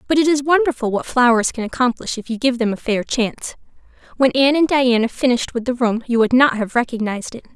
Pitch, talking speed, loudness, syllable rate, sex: 245 Hz, 230 wpm, -18 LUFS, 6.3 syllables/s, female